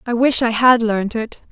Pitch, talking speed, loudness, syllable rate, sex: 230 Hz, 240 wpm, -16 LUFS, 4.4 syllables/s, female